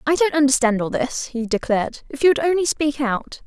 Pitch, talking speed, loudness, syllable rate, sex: 270 Hz, 225 wpm, -20 LUFS, 5.6 syllables/s, female